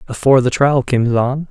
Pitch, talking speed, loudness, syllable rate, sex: 130 Hz, 200 wpm, -14 LUFS, 5.3 syllables/s, male